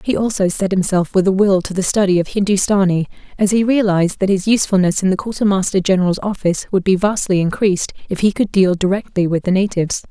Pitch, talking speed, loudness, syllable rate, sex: 190 Hz, 210 wpm, -16 LUFS, 6.3 syllables/s, female